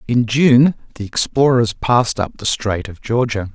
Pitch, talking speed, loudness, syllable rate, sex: 120 Hz, 170 wpm, -16 LUFS, 4.4 syllables/s, male